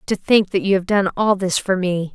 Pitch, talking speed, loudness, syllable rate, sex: 190 Hz, 280 wpm, -18 LUFS, 5.0 syllables/s, female